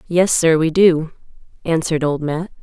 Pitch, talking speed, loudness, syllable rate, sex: 165 Hz, 160 wpm, -16 LUFS, 4.8 syllables/s, female